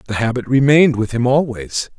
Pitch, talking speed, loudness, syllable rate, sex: 125 Hz, 180 wpm, -16 LUFS, 5.7 syllables/s, male